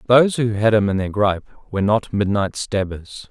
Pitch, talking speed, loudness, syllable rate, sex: 105 Hz, 200 wpm, -19 LUFS, 5.1 syllables/s, male